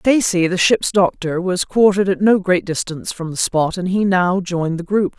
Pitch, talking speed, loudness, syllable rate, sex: 185 Hz, 220 wpm, -17 LUFS, 5.1 syllables/s, female